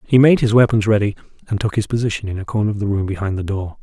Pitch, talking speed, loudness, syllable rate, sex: 105 Hz, 280 wpm, -18 LUFS, 7.2 syllables/s, male